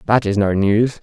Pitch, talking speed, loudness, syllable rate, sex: 105 Hz, 235 wpm, -16 LUFS, 4.6 syllables/s, male